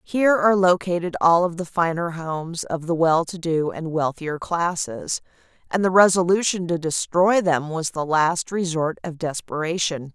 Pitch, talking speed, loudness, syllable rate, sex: 170 Hz, 165 wpm, -21 LUFS, 4.6 syllables/s, female